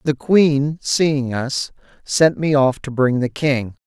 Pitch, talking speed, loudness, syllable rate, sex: 140 Hz, 170 wpm, -18 LUFS, 3.3 syllables/s, male